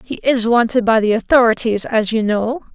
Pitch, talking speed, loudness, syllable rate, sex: 230 Hz, 195 wpm, -15 LUFS, 5.0 syllables/s, female